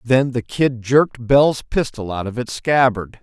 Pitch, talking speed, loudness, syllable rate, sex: 125 Hz, 185 wpm, -18 LUFS, 4.2 syllables/s, male